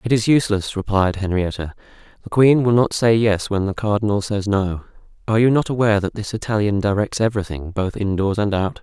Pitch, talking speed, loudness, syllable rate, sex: 105 Hz, 195 wpm, -19 LUFS, 5.9 syllables/s, male